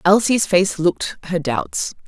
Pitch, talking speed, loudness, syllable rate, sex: 180 Hz, 145 wpm, -19 LUFS, 4.0 syllables/s, female